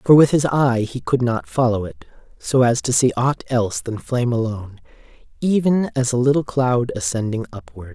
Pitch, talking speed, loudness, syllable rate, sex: 125 Hz, 190 wpm, -19 LUFS, 5.1 syllables/s, male